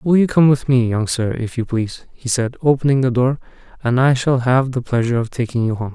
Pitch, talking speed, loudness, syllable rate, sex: 125 Hz, 250 wpm, -17 LUFS, 5.8 syllables/s, male